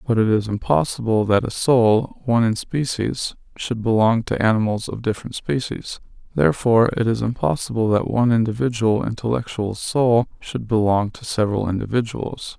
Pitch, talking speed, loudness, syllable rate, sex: 115 Hz, 150 wpm, -20 LUFS, 5.3 syllables/s, male